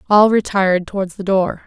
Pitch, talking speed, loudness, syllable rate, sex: 195 Hz, 180 wpm, -16 LUFS, 5.5 syllables/s, female